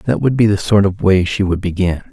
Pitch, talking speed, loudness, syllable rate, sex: 100 Hz, 285 wpm, -15 LUFS, 5.5 syllables/s, male